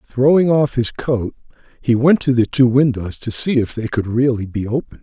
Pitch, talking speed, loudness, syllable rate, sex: 125 Hz, 215 wpm, -17 LUFS, 4.9 syllables/s, male